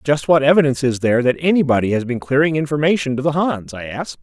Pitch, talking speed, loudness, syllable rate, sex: 140 Hz, 225 wpm, -17 LUFS, 6.8 syllables/s, male